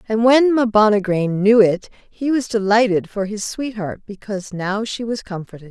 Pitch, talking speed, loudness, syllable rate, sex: 210 Hz, 170 wpm, -18 LUFS, 4.8 syllables/s, female